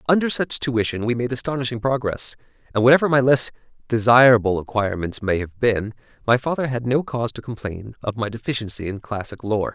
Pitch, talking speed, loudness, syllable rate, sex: 120 Hz, 180 wpm, -21 LUFS, 5.9 syllables/s, male